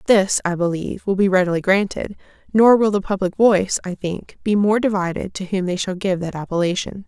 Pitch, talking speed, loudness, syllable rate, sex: 190 Hz, 205 wpm, -19 LUFS, 5.6 syllables/s, female